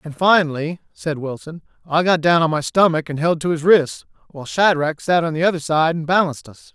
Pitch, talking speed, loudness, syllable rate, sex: 160 Hz, 220 wpm, -18 LUFS, 5.6 syllables/s, male